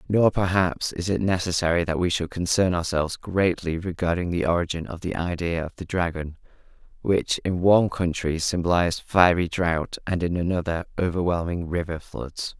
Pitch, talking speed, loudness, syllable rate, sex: 85 Hz, 155 wpm, -24 LUFS, 5.1 syllables/s, male